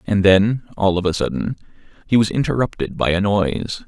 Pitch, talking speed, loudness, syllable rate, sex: 100 Hz, 185 wpm, -19 LUFS, 5.4 syllables/s, male